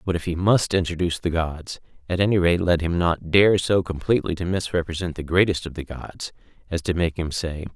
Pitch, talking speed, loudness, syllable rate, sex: 85 Hz, 215 wpm, -22 LUFS, 5.6 syllables/s, male